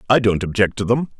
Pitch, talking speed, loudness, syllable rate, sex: 110 Hz, 250 wpm, -18 LUFS, 6.2 syllables/s, male